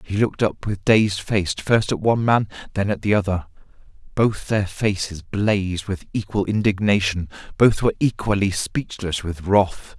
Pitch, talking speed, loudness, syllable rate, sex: 100 Hz, 160 wpm, -21 LUFS, 4.7 syllables/s, male